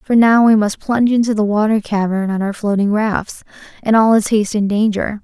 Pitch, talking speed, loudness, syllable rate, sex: 215 Hz, 220 wpm, -15 LUFS, 5.5 syllables/s, female